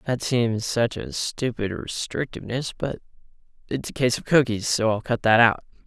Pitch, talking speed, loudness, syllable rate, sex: 120 Hz, 175 wpm, -23 LUFS, 4.8 syllables/s, male